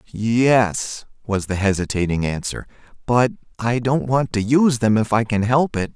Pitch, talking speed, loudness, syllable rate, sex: 115 Hz, 170 wpm, -19 LUFS, 4.4 syllables/s, male